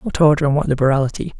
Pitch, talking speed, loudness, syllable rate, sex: 145 Hz, 215 wpm, -17 LUFS, 7.5 syllables/s, female